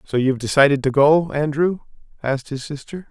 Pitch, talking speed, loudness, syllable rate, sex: 145 Hz, 175 wpm, -19 LUFS, 5.7 syllables/s, male